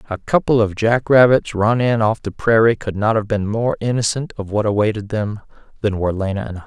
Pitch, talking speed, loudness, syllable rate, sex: 110 Hz, 225 wpm, -18 LUFS, 5.7 syllables/s, male